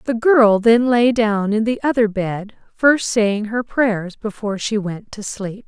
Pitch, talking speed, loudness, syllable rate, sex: 220 Hz, 190 wpm, -17 LUFS, 3.9 syllables/s, female